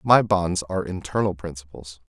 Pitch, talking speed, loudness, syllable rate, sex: 90 Hz, 140 wpm, -23 LUFS, 5.3 syllables/s, male